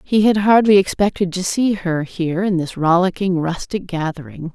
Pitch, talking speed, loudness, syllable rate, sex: 180 Hz, 170 wpm, -17 LUFS, 4.9 syllables/s, female